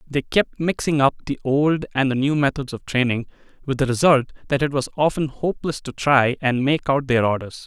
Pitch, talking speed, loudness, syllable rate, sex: 135 Hz, 210 wpm, -21 LUFS, 5.3 syllables/s, male